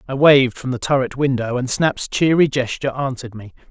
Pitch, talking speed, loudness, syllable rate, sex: 130 Hz, 195 wpm, -18 LUFS, 5.9 syllables/s, male